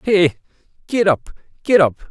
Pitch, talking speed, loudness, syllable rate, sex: 180 Hz, 115 wpm, -17 LUFS, 4.6 syllables/s, male